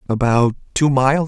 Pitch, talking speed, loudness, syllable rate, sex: 130 Hz, 140 wpm, -17 LUFS, 5.2 syllables/s, male